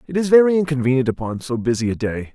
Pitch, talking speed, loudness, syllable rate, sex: 135 Hz, 230 wpm, -19 LUFS, 6.8 syllables/s, male